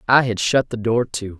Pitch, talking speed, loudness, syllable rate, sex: 115 Hz, 260 wpm, -19 LUFS, 4.9 syllables/s, male